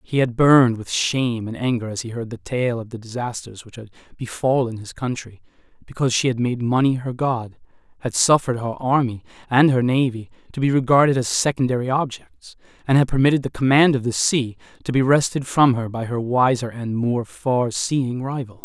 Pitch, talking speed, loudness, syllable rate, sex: 125 Hz, 195 wpm, -20 LUFS, 5.4 syllables/s, male